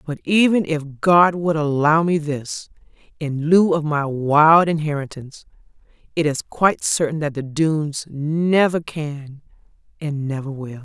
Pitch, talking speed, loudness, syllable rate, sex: 155 Hz, 145 wpm, -19 LUFS, 4.3 syllables/s, female